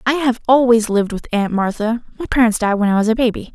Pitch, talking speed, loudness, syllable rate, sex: 230 Hz, 235 wpm, -16 LUFS, 6.3 syllables/s, female